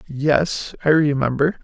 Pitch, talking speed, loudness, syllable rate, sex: 150 Hz, 110 wpm, -19 LUFS, 3.8 syllables/s, male